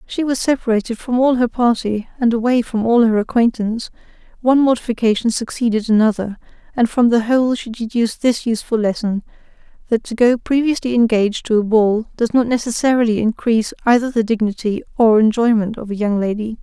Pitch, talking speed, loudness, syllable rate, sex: 230 Hz, 170 wpm, -17 LUFS, 5.9 syllables/s, female